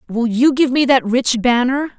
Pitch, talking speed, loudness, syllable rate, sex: 250 Hz, 210 wpm, -15 LUFS, 4.8 syllables/s, female